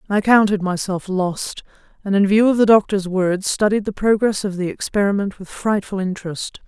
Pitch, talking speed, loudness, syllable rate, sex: 200 Hz, 180 wpm, -19 LUFS, 5.1 syllables/s, female